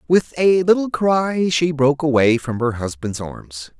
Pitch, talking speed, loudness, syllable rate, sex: 145 Hz, 175 wpm, -18 LUFS, 4.2 syllables/s, male